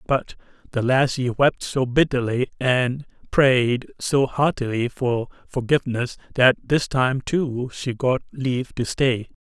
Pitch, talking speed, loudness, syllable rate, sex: 130 Hz, 135 wpm, -22 LUFS, 3.9 syllables/s, male